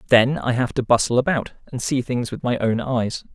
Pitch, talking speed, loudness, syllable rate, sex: 125 Hz, 235 wpm, -21 LUFS, 5.2 syllables/s, male